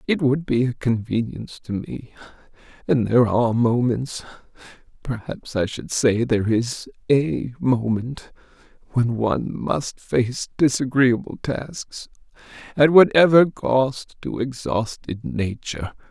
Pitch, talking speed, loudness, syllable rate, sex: 125 Hz, 110 wpm, -21 LUFS, 4.0 syllables/s, male